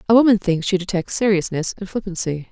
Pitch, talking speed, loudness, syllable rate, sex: 190 Hz, 190 wpm, -19 LUFS, 6.2 syllables/s, female